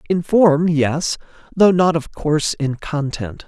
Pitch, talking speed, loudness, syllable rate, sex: 155 Hz, 155 wpm, -17 LUFS, 3.8 syllables/s, male